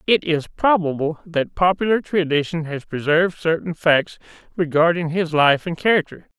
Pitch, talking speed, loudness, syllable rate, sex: 165 Hz, 140 wpm, -19 LUFS, 4.8 syllables/s, male